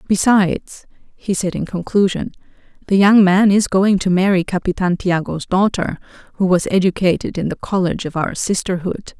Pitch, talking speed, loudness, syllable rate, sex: 185 Hz, 155 wpm, -17 LUFS, 5.0 syllables/s, female